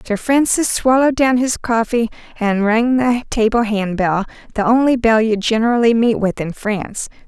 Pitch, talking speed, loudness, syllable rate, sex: 230 Hz, 165 wpm, -16 LUFS, 4.9 syllables/s, female